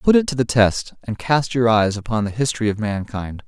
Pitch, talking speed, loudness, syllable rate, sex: 115 Hz, 240 wpm, -20 LUFS, 5.5 syllables/s, male